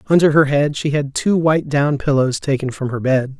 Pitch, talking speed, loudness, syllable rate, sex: 145 Hz, 230 wpm, -17 LUFS, 5.2 syllables/s, male